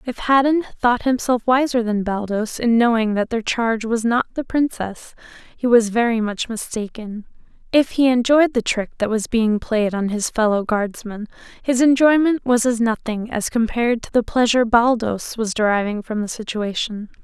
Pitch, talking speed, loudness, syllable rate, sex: 230 Hz, 175 wpm, -19 LUFS, 4.8 syllables/s, female